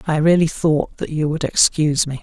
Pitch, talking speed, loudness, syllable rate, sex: 155 Hz, 215 wpm, -18 LUFS, 5.3 syllables/s, male